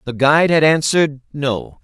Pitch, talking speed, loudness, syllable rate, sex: 145 Hz, 165 wpm, -15 LUFS, 5.0 syllables/s, male